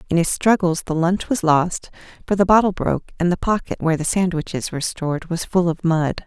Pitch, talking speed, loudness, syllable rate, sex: 175 Hz, 220 wpm, -20 LUFS, 5.7 syllables/s, female